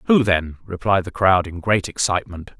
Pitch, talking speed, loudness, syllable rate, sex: 95 Hz, 185 wpm, -19 LUFS, 5.3 syllables/s, male